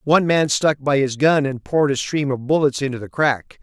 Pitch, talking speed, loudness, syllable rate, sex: 140 Hz, 250 wpm, -19 LUFS, 5.4 syllables/s, male